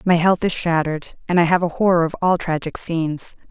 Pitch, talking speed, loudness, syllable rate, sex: 170 Hz, 220 wpm, -19 LUFS, 5.8 syllables/s, female